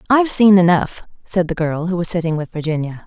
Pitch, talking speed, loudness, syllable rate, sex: 175 Hz, 215 wpm, -16 LUFS, 6.0 syllables/s, female